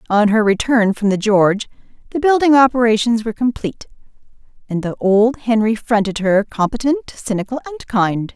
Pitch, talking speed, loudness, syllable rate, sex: 225 Hz, 150 wpm, -16 LUFS, 5.5 syllables/s, female